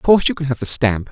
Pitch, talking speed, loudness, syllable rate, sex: 135 Hz, 375 wpm, -17 LUFS, 7.5 syllables/s, male